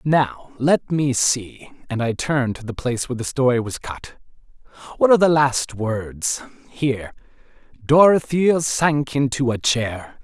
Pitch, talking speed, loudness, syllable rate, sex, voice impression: 130 Hz, 150 wpm, -20 LUFS, 4.3 syllables/s, male, masculine, adult-like, sincere, slightly calm, friendly